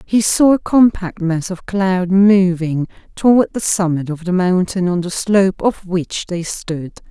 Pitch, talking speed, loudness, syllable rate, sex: 185 Hz, 175 wpm, -16 LUFS, 4.1 syllables/s, female